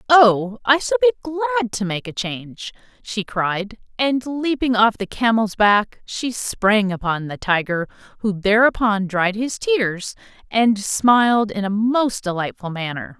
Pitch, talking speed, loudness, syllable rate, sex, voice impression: 220 Hz, 155 wpm, -19 LUFS, 4.0 syllables/s, female, feminine, adult-like, slightly powerful, clear, slightly friendly, slightly intense